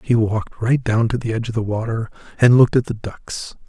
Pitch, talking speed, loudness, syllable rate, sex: 115 Hz, 245 wpm, -19 LUFS, 6.0 syllables/s, male